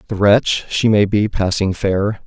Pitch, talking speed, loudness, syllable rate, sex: 105 Hz, 185 wpm, -16 LUFS, 4.0 syllables/s, male